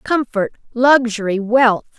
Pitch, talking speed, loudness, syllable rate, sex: 235 Hz, 90 wpm, -16 LUFS, 3.8 syllables/s, female